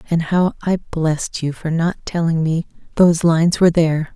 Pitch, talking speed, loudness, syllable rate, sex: 165 Hz, 190 wpm, -17 LUFS, 5.5 syllables/s, female